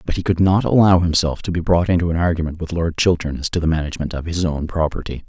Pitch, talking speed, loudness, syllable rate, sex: 85 Hz, 260 wpm, -19 LUFS, 6.6 syllables/s, male